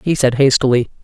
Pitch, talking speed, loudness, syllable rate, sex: 130 Hz, 175 wpm, -14 LUFS, 6.0 syllables/s, female